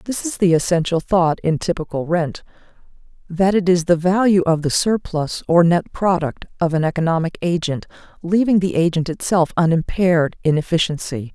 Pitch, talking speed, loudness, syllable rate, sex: 170 Hz, 155 wpm, -18 LUFS, 5.1 syllables/s, female